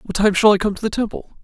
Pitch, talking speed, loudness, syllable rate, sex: 205 Hz, 335 wpm, -18 LUFS, 6.5 syllables/s, male